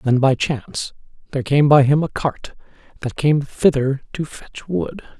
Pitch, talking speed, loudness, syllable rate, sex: 140 Hz, 175 wpm, -19 LUFS, 4.5 syllables/s, male